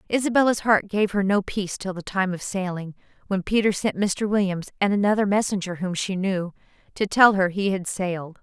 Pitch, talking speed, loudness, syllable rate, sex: 195 Hz, 200 wpm, -23 LUFS, 5.4 syllables/s, female